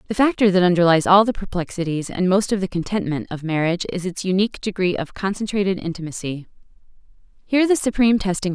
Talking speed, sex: 190 wpm, female